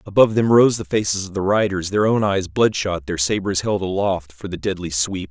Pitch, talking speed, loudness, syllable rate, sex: 95 Hz, 225 wpm, -19 LUFS, 5.4 syllables/s, male